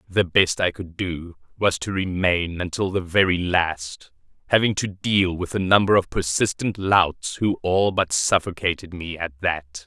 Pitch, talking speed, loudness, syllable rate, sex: 90 Hz, 170 wpm, -22 LUFS, 4.1 syllables/s, male